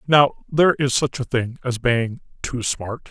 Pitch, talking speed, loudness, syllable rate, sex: 130 Hz, 195 wpm, -21 LUFS, 4.3 syllables/s, male